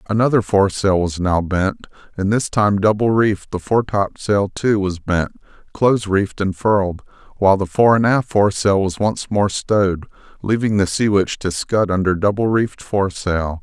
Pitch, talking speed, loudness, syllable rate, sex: 100 Hz, 170 wpm, -18 LUFS, 5.1 syllables/s, male